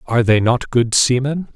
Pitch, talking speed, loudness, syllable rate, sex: 125 Hz, 195 wpm, -16 LUFS, 5.0 syllables/s, male